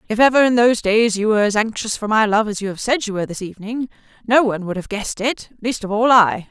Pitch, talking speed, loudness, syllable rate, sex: 220 Hz, 275 wpm, -18 LUFS, 6.7 syllables/s, female